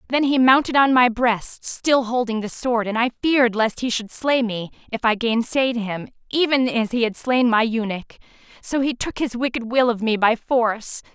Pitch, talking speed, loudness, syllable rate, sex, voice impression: 240 Hz, 210 wpm, -20 LUFS, 4.8 syllables/s, female, feminine, slightly young, tensed, powerful, slightly hard, clear, fluent, intellectual, calm, elegant, lively, strict, sharp